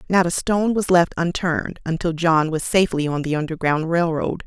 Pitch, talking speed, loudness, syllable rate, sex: 165 Hz, 200 wpm, -20 LUFS, 5.5 syllables/s, female